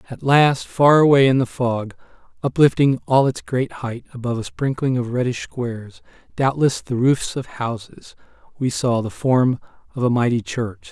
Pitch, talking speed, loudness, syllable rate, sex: 125 Hz, 170 wpm, -19 LUFS, 4.7 syllables/s, male